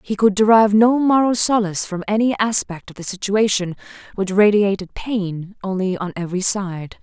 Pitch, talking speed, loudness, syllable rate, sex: 200 Hz, 160 wpm, -18 LUFS, 5.1 syllables/s, female